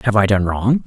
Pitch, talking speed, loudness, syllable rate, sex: 105 Hz, 275 wpm, -17 LUFS, 4.8 syllables/s, male